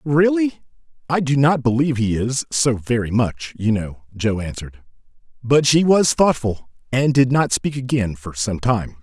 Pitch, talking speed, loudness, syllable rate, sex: 125 Hz, 165 wpm, -19 LUFS, 4.6 syllables/s, male